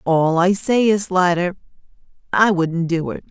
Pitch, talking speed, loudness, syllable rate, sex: 180 Hz, 165 wpm, -18 LUFS, 4.2 syllables/s, female